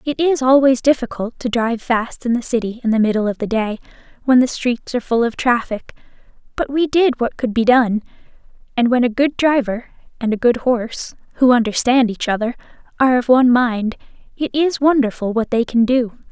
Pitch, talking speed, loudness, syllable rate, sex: 245 Hz, 200 wpm, -17 LUFS, 5.5 syllables/s, female